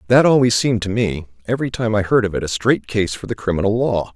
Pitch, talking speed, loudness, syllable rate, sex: 110 Hz, 260 wpm, -18 LUFS, 6.4 syllables/s, male